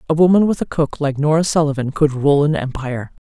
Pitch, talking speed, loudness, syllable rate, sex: 150 Hz, 220 wpm, -17 LUFS, 6.1 syllables/s, female